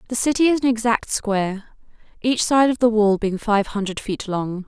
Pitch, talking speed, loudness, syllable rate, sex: 220 Hz, 205 wpm, -20 LUFS, 5.0 syllables/s, female